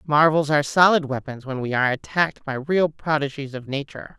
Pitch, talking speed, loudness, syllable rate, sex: 145 Hz, 185 wpm, -21 LUFS, 5.9 syllables/s, female